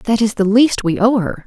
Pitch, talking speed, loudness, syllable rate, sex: 215 Hz, 285 wpm, -15 LUFS, 4.9 syllables/s, female